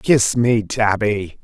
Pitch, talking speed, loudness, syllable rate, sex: 110 Hz, 125 wpm, -17 LUFS, 2.9 syllables/s, male